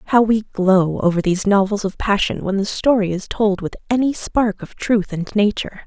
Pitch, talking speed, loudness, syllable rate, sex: 205 Hz, 205 wpm, -18 LUFS, 5.2 syllables/s, female